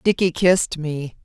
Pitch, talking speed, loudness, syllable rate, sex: 165 Hz, 145 wpm, -20 LUFS, 4.6 syllables/s, female